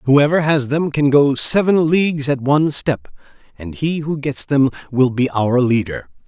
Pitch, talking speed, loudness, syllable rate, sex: 140 Hz, 180 wpm, -16 LUFS, 4.5 syllables/s, male